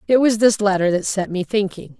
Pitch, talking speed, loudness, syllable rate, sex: 200 Hz, 240 wpm, -18 LUFS, 5.5 syllables/s, female